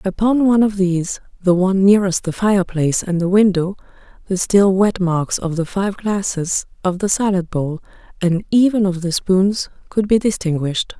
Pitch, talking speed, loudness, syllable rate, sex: 190 Hz, 175 wpm, -17 LUFS, 5.2 syllables/s, female